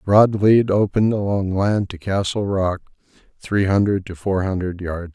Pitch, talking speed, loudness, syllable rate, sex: 95 Hz, 165 wpm, -19 LUFS, 4.5 syllables/s, male